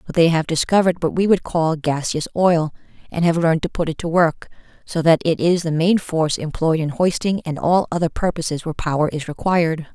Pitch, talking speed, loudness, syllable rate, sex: 165 Hz, 215 wpm, -19 LUFS, 5.7 syllables/s, female